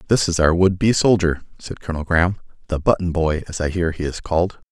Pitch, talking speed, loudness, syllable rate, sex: 85 Hz, 215 wpm, -19 LUFS, 6.1 syllables/s, male